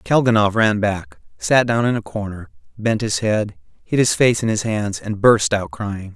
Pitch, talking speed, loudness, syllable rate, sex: 105 Hz, 205 wpm, -18 LUFS, 4.4 syllables/s, male